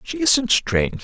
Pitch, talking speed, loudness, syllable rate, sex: 145 Hz, 175 wpm, -18 LUFS, 4.1 syllables/s, male